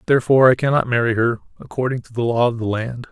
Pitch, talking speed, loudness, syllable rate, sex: 120 Hz, 230 wpm, -18 LUFS, 7.0 syllables/s, male